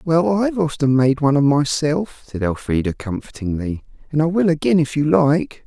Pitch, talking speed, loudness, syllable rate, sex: 145 Hz, 180 wpm, -19 LUFS, 5.2 syllables/s, male